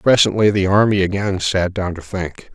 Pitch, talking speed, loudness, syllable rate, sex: 95 Hz, 190 wpm, -17 LUFS, 4.8 syllables/s, male